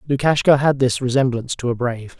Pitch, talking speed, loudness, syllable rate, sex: 130 Hz, 190 wpm, -18 LUFS, 6.5 syllables/s, male